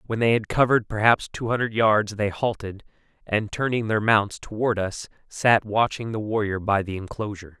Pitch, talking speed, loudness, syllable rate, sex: 105 Hz, 180 wpm, -23 LUFS, 5.1 syllables/s, male